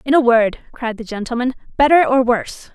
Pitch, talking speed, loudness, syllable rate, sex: 245 Hz, 195 wpm, -17 LUFS, 5.5 syllables/s, female